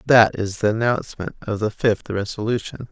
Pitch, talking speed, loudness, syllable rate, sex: 110 Hz, 165 wpm, -21 LUFS, 5.1 syllables/s, male